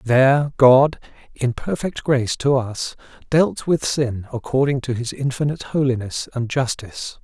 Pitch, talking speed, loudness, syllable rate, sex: 130 Hz, 140 wpm, -20 LUFS, 4.6 syllables/s, male